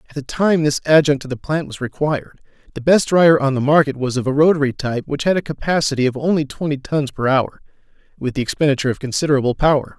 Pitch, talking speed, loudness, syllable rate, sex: 145 Hz, 220 wpm, -18 LUFS, 6.6 syllables/s, male